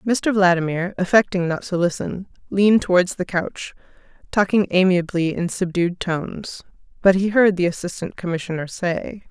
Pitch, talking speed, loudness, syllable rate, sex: 185 Hz, 140 wpm, -20 LUFS, 5.0 syllables/s, female